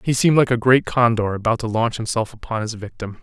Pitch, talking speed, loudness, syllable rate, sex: 115 Hz, 240 wpm, -19 LUFS, 6.1 syllables/s, male